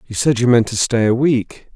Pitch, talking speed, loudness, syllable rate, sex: 120 Hz, 275 wpm, -16 LUFS, 5.0 syllables/s, male